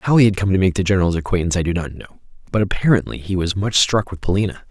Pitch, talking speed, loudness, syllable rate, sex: 95 Hz, 270 wpm, -18 LUFS, 7.3 syllables/s, male